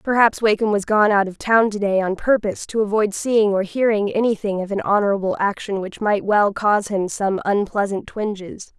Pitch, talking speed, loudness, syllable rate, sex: 205 Hz, 200 wpm, -19 LUFS, 5.2 syllables/s, female